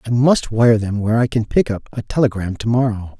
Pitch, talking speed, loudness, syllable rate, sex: 115 Hz, 245 wpm, -17 LUFS, 5.6 syllables/s, male